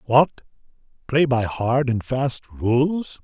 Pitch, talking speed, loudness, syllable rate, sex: 130 Hz, 130 wpm, -21 LUFS, 2.9 syllables/s, male